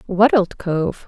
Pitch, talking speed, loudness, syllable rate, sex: 195 Hz, 170 wpm, -18 LUFS, 3.3 syllables/s, female